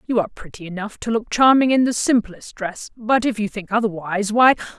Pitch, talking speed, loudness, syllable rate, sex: 220 Hz, 215 wpm, -19 LUFS, 5.7 syllables/s, female